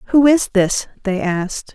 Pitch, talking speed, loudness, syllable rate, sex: 215 Hz, 170 wpm, -17 LUFS, 3.9 syllables/s, female